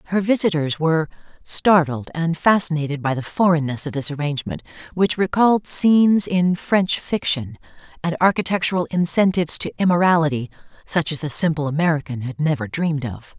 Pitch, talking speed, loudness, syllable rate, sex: 165 Hz, 145 wpm, -20 LUFS, 5.6 syllables/s, female